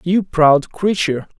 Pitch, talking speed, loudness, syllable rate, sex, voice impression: 170 Hz, 130 wpm, -16 LUFS, 4.1 syllables/s, male, masculine, adult-like, slightly refreshing, sincere, slightly friendly, kind